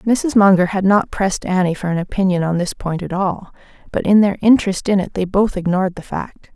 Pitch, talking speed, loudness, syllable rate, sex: 190 Hz, 230 wpm, -17 LUFS, 5.6 syllables/s, female